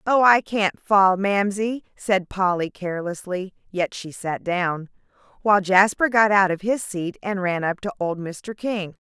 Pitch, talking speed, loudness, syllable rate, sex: 195 Hz, 170 wpm, -22 LUFS, 4.2 syllables/s, female